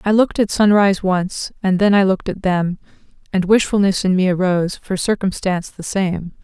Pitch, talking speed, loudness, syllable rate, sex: 190 Hz, 185 wpm, -17 LUFS, 5.5 syllables/s, female